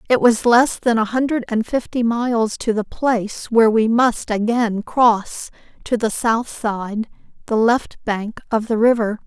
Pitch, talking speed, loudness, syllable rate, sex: 230 Hz, 175 wpm, -18 LUFS, 4.2 syllables/s, female